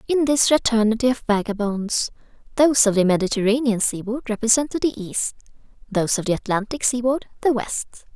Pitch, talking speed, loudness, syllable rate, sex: 230 Hz, 145 wpm, -21 LUFS, 5.8 syllables/s, female